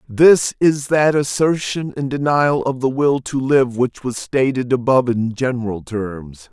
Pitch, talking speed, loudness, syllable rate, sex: 130 Hz, 165 wpm, -17 LUFS, 4.2 syllables/s, male